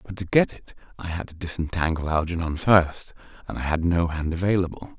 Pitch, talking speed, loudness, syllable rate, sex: 85 Hz, 195 wpm, -24 LUFS, 5.5 syllables/s, male